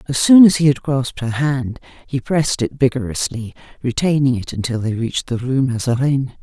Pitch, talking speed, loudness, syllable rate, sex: 130 Hz, 185 wpm, -17 LUFS, 5.6 syllables/s, female